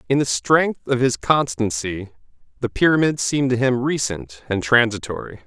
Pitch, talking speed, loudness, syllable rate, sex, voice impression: 120 Hz, 155 wpm, -20 LUFS, 4.7 syllables/s, male, masculine, adult-like, cool, intellectual, slightly refreshing, slightly friendly